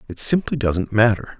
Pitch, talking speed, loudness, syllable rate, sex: 105 Hz, 170 wpm, -19 LUFS, 5.0 syllables/s, male